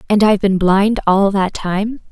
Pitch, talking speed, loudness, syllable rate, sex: 200 Hz, 200 wpm, -15 LUFS, 4.3 syllables/s, female